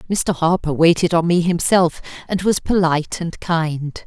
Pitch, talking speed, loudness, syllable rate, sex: 170 Hz, 160 wpm, -18 LUFS, 4.6 syllables/s, female